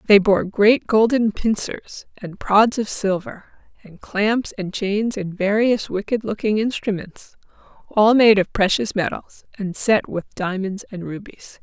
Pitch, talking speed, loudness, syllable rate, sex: 205 Hz, 150 wpm, -19 LUFS, 3.9 syllables/s, female